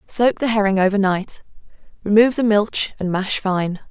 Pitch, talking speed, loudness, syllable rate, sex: 205 Hz, 170 wpm, -18 LUFS, 5.0 syllables/s, female